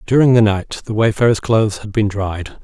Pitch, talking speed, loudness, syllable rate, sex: 110 Hz, 205 wpm, -16 LUFS, 5.3 syllables/s, male